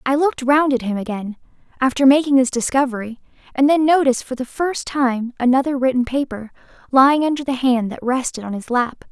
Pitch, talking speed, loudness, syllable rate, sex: 260 Hz, 190 wpm, -18 LUFS, 5.8 syllables/s, female